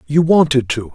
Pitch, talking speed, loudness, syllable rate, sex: 130 Hz, 190 wpm, -14 LUFS, 4.9 syllables/s, male